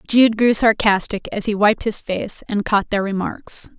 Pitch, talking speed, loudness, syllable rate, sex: 210 Hz, 190 wpm, -18 LUFS, 4.3 syllables/s, female